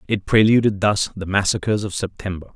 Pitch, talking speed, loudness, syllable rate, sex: 100 Hz, 165 wpm, -19 LUFS, 5.7 syllables/s, male